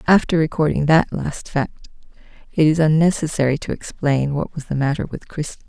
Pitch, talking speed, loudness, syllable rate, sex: 150 Hz, 170 wpm, -19 LUFS, 5.3 syllables/s, female